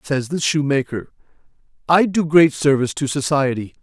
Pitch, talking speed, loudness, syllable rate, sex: 145 Hz, 140 wpm, -18 LUFS, 4.4 syllables/s, male